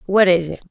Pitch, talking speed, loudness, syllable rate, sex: 185 Hz, 255 wpm, -16 LUFS, 6.0 syllables/s, female